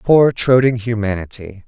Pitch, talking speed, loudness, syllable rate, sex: 115 Hz, 105 wpm, -15 LUFS, 4.5 syllables/s, male